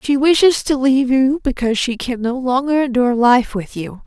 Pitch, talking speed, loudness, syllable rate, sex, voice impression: 255 Hz, 205 wpm, -16 LUFS, 5.4 syllables/s, female, feminine, adult-like, tensed, powerful, slightly bright, clear, halting, friendly, unique, lively, intense, slightly sharp